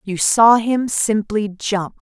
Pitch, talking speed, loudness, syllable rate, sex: 215 Hz, 140 wpm, -17 LUFS, 3.1 syllables/s, female